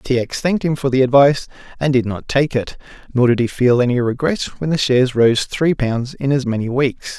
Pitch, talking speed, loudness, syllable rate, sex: 130 Hz, 235 wpm, -17 LUFS, 5.5 syllables/s, male